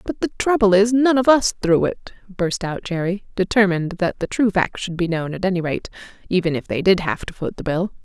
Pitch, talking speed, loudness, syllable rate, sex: 190 Hz, 240 wpm, -20 LUFS, 5.5 syllables/s, female